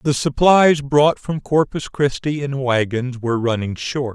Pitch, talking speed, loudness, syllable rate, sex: 135 Hz, 160 wpm, -18 LUFS, 4.2 syllables/s, male